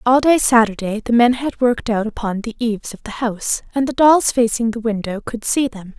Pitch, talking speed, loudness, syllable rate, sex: 235 Hz, 230 wpm, -17 LUFS, 5.5 syllables/s, female